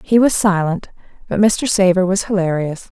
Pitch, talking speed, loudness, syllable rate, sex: 190 Hz, 160 wpm, -16 LUFS, 4.9 syllables/s, female